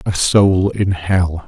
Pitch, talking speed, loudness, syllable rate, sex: 95 Hz, 160 wpm, -15 LUFS, 3.0 syllables/s, male